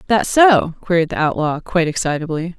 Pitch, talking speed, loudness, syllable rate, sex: 175 Hz, 160 wpm, -17 LUFS, 5.5 syllables/s, female